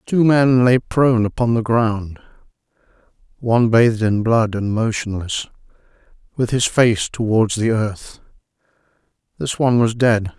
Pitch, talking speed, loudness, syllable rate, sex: 115 Hz, 135 wpm, -17 LUFS, 4.5 syllables/s, male